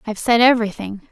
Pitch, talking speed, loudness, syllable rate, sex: 225 Hz, 160 wpm, -16 LUFS, 7.2 syllables/s, female